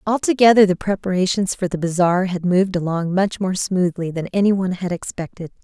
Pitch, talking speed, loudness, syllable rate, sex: 185 Hz, 180 wpm, -19 LUFS, 5.7 syllables/s, female